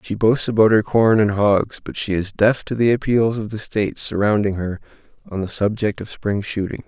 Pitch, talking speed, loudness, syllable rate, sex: 105 Hz, 220 wpm, -19 LUFS, 5.1 syllables/s, male